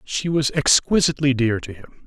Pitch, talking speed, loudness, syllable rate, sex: 135 Hz, 175 wpm, -19 LUFS, 5.7 syllables/s, male